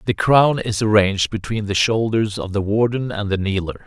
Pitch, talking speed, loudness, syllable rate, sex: 105 Hz, 200 wpm, -19 LUFS, 5.1 syllables/s, male